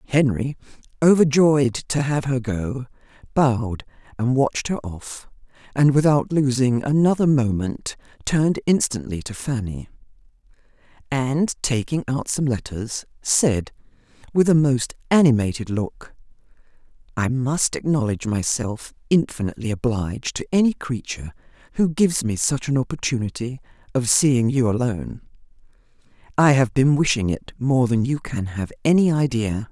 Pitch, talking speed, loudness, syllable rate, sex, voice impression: 130 Hz, 125 wpm, -21 LUFS, 4.7 syllables/s, female, gender-neutral, adult-like